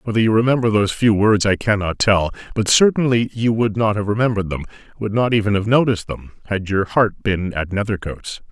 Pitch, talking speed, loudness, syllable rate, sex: 105 Hz, 190 wpm, -18 LUFS, 5.9 syllables/s, male